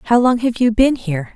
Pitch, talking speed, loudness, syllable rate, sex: 230 Hz, 265 wpm, -16 LUFS, 5.3 syllables/s, female